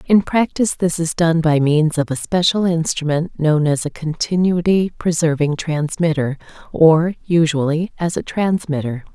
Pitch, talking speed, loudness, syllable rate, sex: 165 Hz, 145 wpm, -17 LUFS, 4.5 syllables/s, female